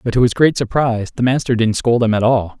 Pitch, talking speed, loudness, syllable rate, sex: 115 Hz, 255 wpm, -16 LUFS, 5.9 syllables/s, male